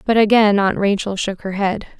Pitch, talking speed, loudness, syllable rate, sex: 200 Hz, 210 wpm, -17 LUFS, 5.0 syllables/s, female